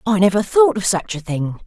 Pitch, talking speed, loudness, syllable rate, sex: 200 Hz, 255 wpm, -17 LUFS, 5.3 syllables/s, female